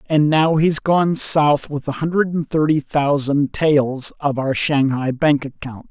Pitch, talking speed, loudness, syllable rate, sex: 145 Hz, 175 wpm, -18 LUFS, 3.8 syllables/s, male